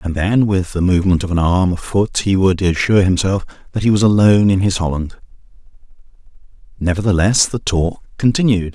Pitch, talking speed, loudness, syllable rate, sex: 95 Hz, 170 wpm, -15 LUFS, 5.7 syllables/s, male